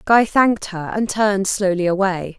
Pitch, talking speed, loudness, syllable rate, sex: 195 Hz, 175 wpm, -18 LUFS, 4.9 syllables/s, female